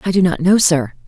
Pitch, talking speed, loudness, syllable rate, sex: 175 Hz, 280 wpm, -14 LUFS, 5.7 syllables/s, female